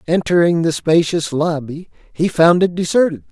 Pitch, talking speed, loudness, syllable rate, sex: 165 Hz, 145 wpm, -16 LUFS, 4.7 syllables/s, male